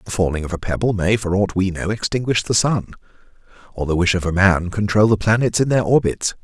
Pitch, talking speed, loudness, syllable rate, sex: 100 Hz, 235 wpm, -18 LUFS, 5.8 syllables/s, male